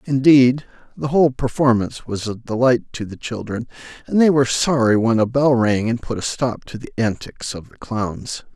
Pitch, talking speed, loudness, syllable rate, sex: 120 Hz, 195 wpm, -19 LUFS, 5.0 syllables/s, male